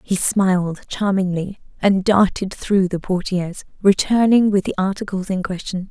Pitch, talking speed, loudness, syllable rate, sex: 190 Hz, 140 wpm, -19 LUFS, 4.7 syllables/s, female